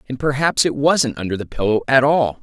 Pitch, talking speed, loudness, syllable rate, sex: 130 Hz, 225 wpm, -17 LUFS, 5.4 syllables/s, male